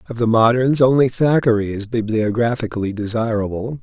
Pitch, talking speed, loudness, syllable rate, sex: 115 Hz, 125 wpm, -18 LUFS, 5.5 syllables/s, male